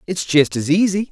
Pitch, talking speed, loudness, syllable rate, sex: 170 Hz, 215 wpm, -17 LUFS, 5.2 syllables/s, male